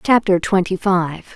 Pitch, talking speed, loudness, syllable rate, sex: 185 Hz, 135 wpm, -17 LUFS, 3.9 syllables/s, female